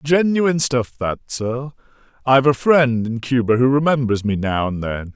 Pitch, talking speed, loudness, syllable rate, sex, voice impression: 125 Hz, 165 wpm, -18 LUFS, 4.7 syllables/s, male, very masculine, very middle-aged, very thick, tensed, very powerful, bright, slightly soft, slightly muffled, fluent, very cool, intellectual, refreshing, slightly sincere, slightly calm, friendly, reassuring, unique, very elegant, wild, sweet, very lively, kind, intense